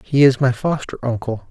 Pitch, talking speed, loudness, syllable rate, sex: 125 Hz, 200 wpm, -18 LUFS, 5.1 syllables/s, male